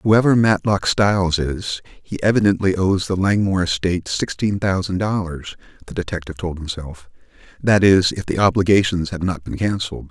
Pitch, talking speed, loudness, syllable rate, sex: 90 Hz, 155 wpm, -19 LUFS, 5.3 syllables/s, male